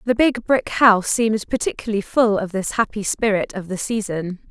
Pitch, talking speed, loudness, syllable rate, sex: 210 Hz, 185 wpm, -20 LUFS, 5.4 syllables/s, female